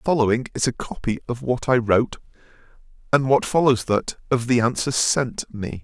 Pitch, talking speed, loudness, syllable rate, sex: 125 Hz, 185 wpm, -21 LUFS, 5.5 syllables/s, male